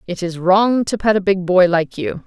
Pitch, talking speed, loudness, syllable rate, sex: 190 Hz, 265 wpm, -16 LUFS, 4.7 syllables/s, female